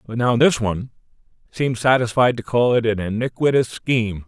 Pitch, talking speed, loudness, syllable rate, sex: 120 Hz, 170 wpm, -19 LUFS, 5.4 syllables/s, male